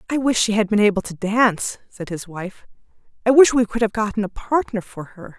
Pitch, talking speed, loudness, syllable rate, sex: 215 Hz, 235 wpm, -19 LUFS, 5.4 syllables/s, female